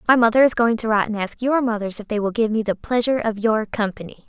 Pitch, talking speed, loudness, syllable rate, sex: 225 Hz, 280 wpm, -20 LUFS, 6.6 syllables/s, female